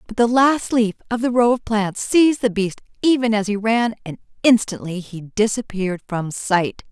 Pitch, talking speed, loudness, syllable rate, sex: 215 Hz, 190 wpm, -19 LUFS, 4.9 syllables/s, female